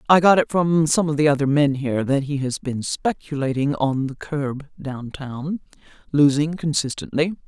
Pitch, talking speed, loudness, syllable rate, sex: 145 Hz, 170 wpm, -21 LUFS, 4.7 syllables/s, female